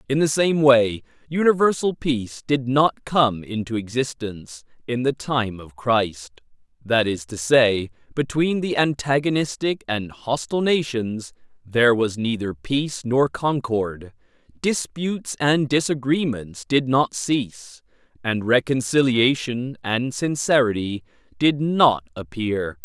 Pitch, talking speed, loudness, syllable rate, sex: 125 Hz, 115 wpm, -21 LUFS, 4.0 syllables/s, male